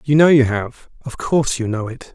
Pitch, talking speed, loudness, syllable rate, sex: 130 Hz, 250 wpm, -17 LUFS, 5.3 syllables/s, male